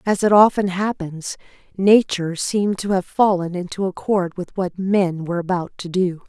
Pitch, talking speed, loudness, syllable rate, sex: 185 Hz, 170 wpm, -20 LUFS, 4.8 syllables/s, female